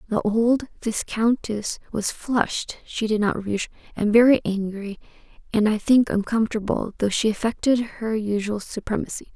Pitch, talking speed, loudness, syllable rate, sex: 220 Hz, 140 wpm, -23 LUFS, 4.6 syllables/s, female